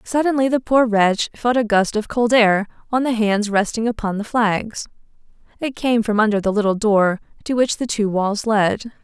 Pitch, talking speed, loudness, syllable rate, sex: 220 Hz, 200 wpm, -18 LUFS, 4.7 syllables/s, female